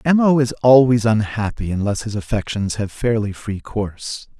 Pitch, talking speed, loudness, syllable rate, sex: 110 Hz, 165 wpm, -19 LUFS, 4.7 syllables/s, male